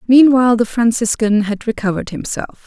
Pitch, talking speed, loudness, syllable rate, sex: 230 Hz, 135 wpm, -15 LUFS, 5.6 syllables/s, female